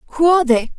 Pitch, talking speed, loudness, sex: 295 Hz, 230 wpm, -15 LUFS, female